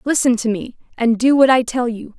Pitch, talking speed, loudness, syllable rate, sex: 240 Hz, 245 wpm, -16 LUFS, 5.3 syllables/s, female